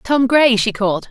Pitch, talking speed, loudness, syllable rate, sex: 235 Hz, 220 wpm, -14 LUFS, 5.0 syllables/s, female